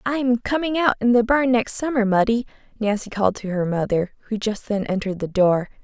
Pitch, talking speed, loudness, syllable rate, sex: 220 Hz, 205 wpm, -21 LUFS, 5.5 syllables/s, female